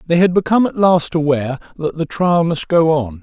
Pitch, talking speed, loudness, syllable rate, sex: 160 Hz, 225 wpm, -16 LUFS, 5.5 syllables/s, male